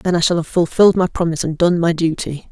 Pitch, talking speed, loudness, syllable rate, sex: 170 Hz, 265 wpm, -16 LUFS, 6.5 syllables/s, female